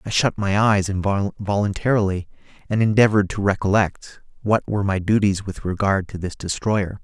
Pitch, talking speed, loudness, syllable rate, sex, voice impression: 100 Hz, 155 wpm, -21 LUFS, 5.2 syllables/s, male, masculine, adult-like, tensed, slightly weak, slightly soft, slightly halting, cool, intellectual, calm, slightly mature, friendly, wild, slightly kind, modest